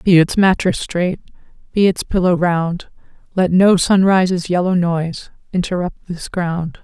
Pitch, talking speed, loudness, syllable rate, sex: 180 Hz, 140 wpm, -16 LUFS, 4.4 syllables/s, female